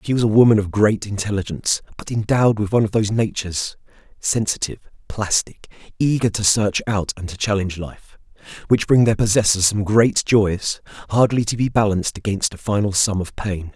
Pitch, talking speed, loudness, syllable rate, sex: 105 Hz, 170 wpm, -19 LUFS, 5.7 syllables/s, male